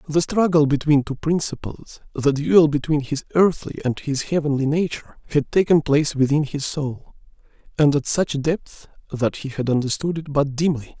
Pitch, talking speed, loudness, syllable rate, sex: 145 Hz, 165 wpm, -20 LUFS, 5.0 syllables/s, male